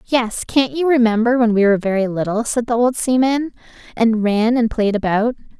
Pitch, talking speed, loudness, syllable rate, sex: 230 Hz, 195 wpm, -17 LUFS, 5.2 syllables/s, female